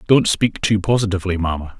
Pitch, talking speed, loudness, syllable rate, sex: 100 Hz, 165 wpm, -18 LUFS, 6.1 syllables/s, male